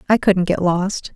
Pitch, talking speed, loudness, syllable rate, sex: 190 Hz, 210 wpm, -18 LUFS, 4.1 syllables/s, female